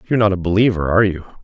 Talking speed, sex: 250 wpm, male